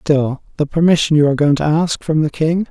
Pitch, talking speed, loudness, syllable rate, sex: 155 Hz, 245 wpm, -15 LUFS, 5.6 syllables/s, male